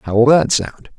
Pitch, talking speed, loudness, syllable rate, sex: 125 Hz, 245 wpm, -14 LUFS, 4.4 syllables/s, male